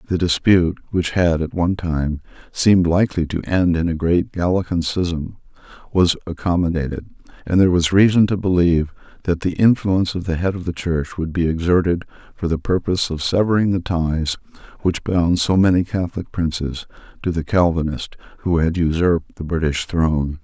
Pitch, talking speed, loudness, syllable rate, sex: 85 Hz, 170 wpm, -19 LUFS, 5.4 syllables/s, male